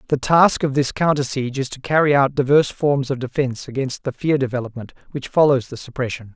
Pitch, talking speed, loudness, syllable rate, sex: 135 Hz, 210 wpm, -19 LUFS, 6.1 syllables/s, male